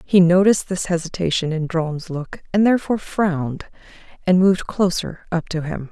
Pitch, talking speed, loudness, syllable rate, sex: 175 Hz, 160 wpm, -20 LUFS, 5.3 syllables/s, female